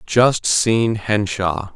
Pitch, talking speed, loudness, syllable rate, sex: 105 Hz, 100 wpm, -18 LUFS, 2.5 syllables/s, male